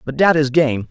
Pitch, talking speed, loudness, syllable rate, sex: 145 Hz, 265 wpm, -15 LUFS, 4.9 syllables/s, male